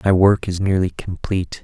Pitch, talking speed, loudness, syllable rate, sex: 90 Hz, 185 wpm, -19 LUFS, 5.2 syllables/s, male